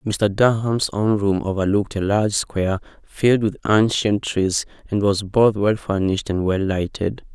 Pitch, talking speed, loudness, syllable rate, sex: 100 Hz, 165 wpm, -20 LUFS, 4.7 syllables/s, male